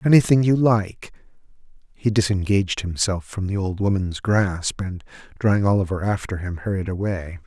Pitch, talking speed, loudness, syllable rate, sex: 100 Hz, 145 wpm, -22 LUFS, 5.0 syllables/s, male